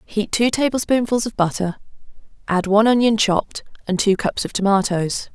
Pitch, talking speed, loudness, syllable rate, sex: 210 Hz, 155 wpm, -19 LUFS, 5.3 syllables/s, female